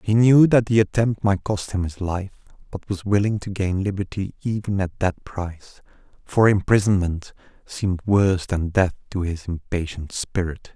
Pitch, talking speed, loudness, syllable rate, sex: 95 Hz, 165 wpm, -22 LUFS, 4.8 syllables/s, male